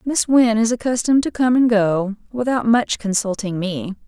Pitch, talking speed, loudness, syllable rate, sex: 225 Hz, 175 wpm, -18 LUFS, 4.8 syllables/s, female